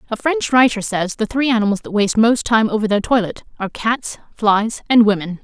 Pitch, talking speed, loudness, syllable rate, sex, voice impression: 220 Hz, 210 wpm, -17 LUFS, 5.6 syllables/s, female, feminine, slightly young, slightly adult-like, slightly thin, tensed, powerful, bright, slightly soft, clear, fluent, slightly cute, slightly cool, intellectual, slightly refreshing, sincere, very calm, reassuring, elegant, slightly sweet, slightly lively, slightly kind, slightly intense